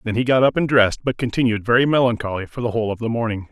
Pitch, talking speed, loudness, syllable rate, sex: 115 Hz, 275 wpm, -19 LUFS, 7.5 syllables/s, male